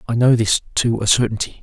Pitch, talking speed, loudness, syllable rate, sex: 115 Hz, 220 wpm, -17 LUFS, 5.4 syllables/s, male